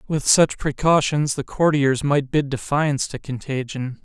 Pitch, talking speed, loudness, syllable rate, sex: 140 Hz, 150 wpm, -20 LUFS, 4.4 syllables/s, male